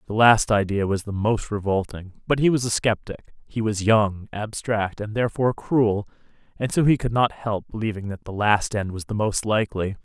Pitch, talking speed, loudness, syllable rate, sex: 105 Hz, 205 wpm, -23 LUFS, 5.2 syllables/s, male